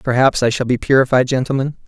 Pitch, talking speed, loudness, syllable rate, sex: 130 Hz, 190 wpm, -16 LUFS, 6.5 syllables/s, male